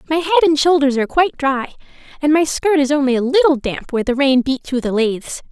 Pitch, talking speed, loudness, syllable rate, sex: 285 Hz, 240 wpm, -16 LUFS, 6.2 syllables/s, female